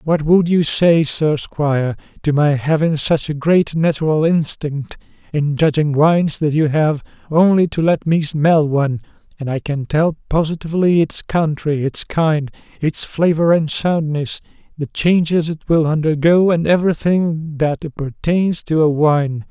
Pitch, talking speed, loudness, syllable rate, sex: 155 Hz, 155 wpm, -16 LUFS, 4.3 syllables/s, male